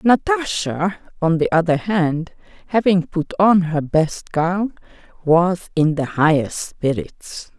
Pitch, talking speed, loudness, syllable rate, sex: 175 Hz, 125 wpm, -19 LUFS, 3.5 syllables/s, female